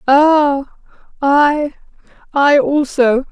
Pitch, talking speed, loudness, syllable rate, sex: 280 Hz, 55 wpm, -14 LUFS, 2.4 syllables/s, female